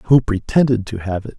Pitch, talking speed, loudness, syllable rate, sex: 110 Hz, 215 wpm, -18 LUFS, 5.2 syllables/s, male